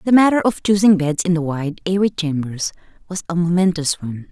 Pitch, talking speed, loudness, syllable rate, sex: 175 Hz, 195 wpm, -18 LUFS, 5.7 syllables/s, female